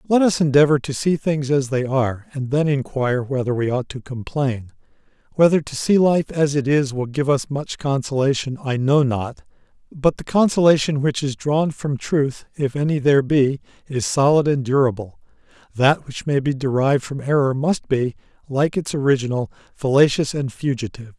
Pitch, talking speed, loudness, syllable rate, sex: 140 Hz, 180 wpm, -20 LUFS, 5.1 syllables/s, male